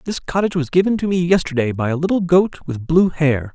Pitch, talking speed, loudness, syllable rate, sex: 165 Hz, 235 wpm, -18 LUFS, 5.9 syllables/s, male